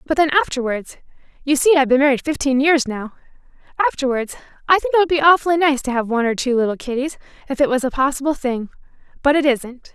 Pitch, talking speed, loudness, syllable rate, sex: 275 Hz, 200 wpm, -18 LUFS, 6.8 syllables/s, female